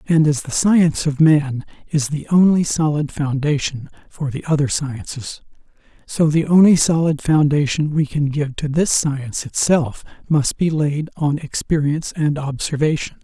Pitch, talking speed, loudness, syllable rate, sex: 150 Hz, 155 wpm, -18 LUFS, 4.5 syllables/s, male